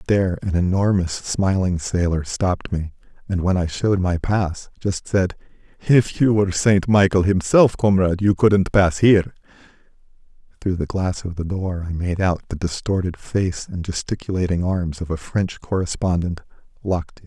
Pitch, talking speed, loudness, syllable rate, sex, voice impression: 90 Hz, 165 wpm, -20 LUFS, 4.9 syllables/s, male, masculine, adult-like, slightly dark, muffled, calm, reassuring, slightly elegant, slightly sweet, kind